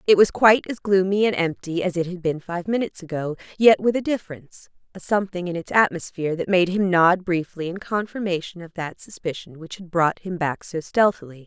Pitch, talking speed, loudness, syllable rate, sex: 180 Hz, 210 wpm, -22 LUFS, 5.8 syllables/s, female